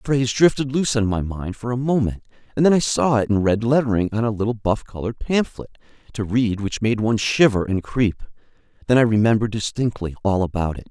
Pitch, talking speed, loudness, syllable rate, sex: 110 Hz, 215 wpm, -20 LUFS, 6.1 syllables/s, male